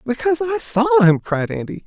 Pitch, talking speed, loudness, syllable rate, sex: 220 Hz, 195 wpm, -17 LUFS, 5.7 syllables/s, male